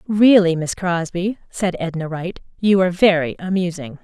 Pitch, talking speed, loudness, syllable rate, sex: 180 Hz, 150 wpm, -18 LUFS, 4.8 syllables/s, female